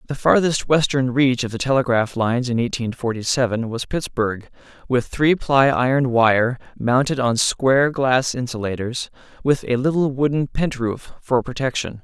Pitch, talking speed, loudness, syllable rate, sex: 125 Hz, 155 wpm, -20 LUFS, 4.7 syllables/s, male